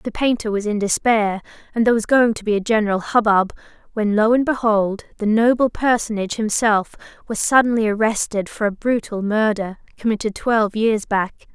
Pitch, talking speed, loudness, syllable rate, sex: 215 Hz, 170 wpm, -19 LUFS, 5.4 syllables/s, female